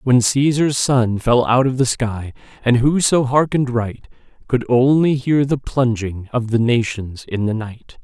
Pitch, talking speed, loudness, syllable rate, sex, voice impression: 125 Hz, 170 wpm, -17 LUFS, 4.2 syllables/s, male, very masculine, old, very thick, tensed, slightly powerful, slightly dark, soft, slightly muffled, fluent, slightly raspy, cool, intellectual, very sincere, very calm, very mature, very friendly, very reassuring, unique, elegant, wild, sweet, slightly lively, strict, slightly intense, slightly modest